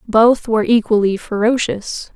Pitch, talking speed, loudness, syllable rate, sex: 225 Hz, 110 wpm, -16 LUFS, 4.5 syllables/s, female